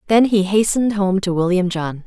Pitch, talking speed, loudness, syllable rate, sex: 195 Hz, 205 wpm, -17 LUFS, 5.4 syllables/s, female